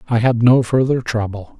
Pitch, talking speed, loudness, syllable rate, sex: 120 Hz, 190 wpm, -16 LUFS, 5.0 syllables/s, male